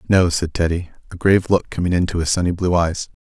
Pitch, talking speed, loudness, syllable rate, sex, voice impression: 90 Hz, 225 wpm, -19 LUFS, 6.2 syllables/s, male, masculine, adult-like, thick, tensed, hard, fluent, cool, sincere, calm, reassuring, slightly wild, kind, modest